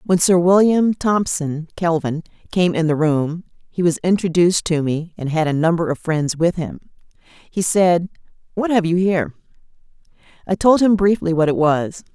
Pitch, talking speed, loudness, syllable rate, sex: 170 Hz, 175 wpm, -18 LUFS, 4.9 syllables/s, female